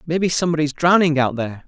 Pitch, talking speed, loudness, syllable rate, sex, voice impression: 155 Hz, 215 wpm, -18 LUFS, 7.7 syllables/s, male, masculine, adult-like, tensed, powerful, bright, clear, slightly halting, cool, friendly, wild, lively, intense, slightly sharp, slightly light